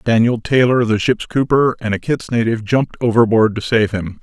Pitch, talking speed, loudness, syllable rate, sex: 115 Hz, 200 wpm, -16 LUFS, 5.5 syllables/s, male